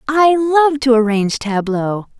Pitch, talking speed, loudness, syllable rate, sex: 255 Hz, 135 wpm, -15 LUFS, 4.1 syllables/s, female